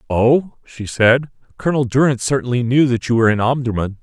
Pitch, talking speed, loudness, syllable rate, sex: 125 Hz, 180 wpm, -16 LUFS, 6.1 syllables/s, male